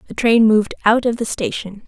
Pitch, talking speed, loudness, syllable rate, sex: 225 Hz, 225 wpm, -16 LUFS, 5.7 syllables/s, female